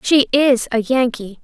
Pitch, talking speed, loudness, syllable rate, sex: 250 Hz, 165 wpm, -16 LUFS, 4.1 syllables/s, female